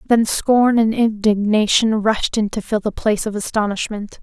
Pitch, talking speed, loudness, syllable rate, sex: 215 Hz, 170 wpm, -17 LUFS, 4.6 syllables/s, female